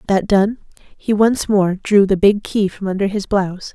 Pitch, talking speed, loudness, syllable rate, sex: 200 Hz, 210 wpm, -16 LUFS, 4.6 syllables/s, female